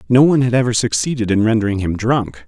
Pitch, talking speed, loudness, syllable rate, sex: 115 Hz, 220 wpm, -16 LUFS, 6.6 syllables/s, male